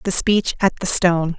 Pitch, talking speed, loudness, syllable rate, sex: 180 Hz, 215 wpm, -17 LUFS, 4.7 syllables/s, female